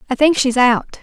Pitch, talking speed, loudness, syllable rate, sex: 265 Hz, 235 wpm, -14 LUFS, 5.9 syllables/s, female